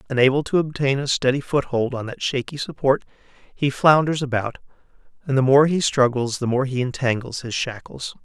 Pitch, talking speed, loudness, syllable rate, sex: 135 Hz, 175 wpm, -21 LUFS, 5.3 syllables/s, male